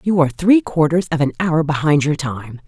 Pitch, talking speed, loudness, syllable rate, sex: 160 Hz, 225 wpm, -17 LUFS, 5.3 syllables/s, female